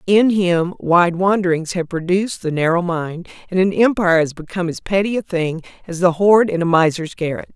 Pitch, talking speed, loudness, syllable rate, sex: 180 Hz, 200 wpm, -17 LUFS, 5.4 syllables/s, female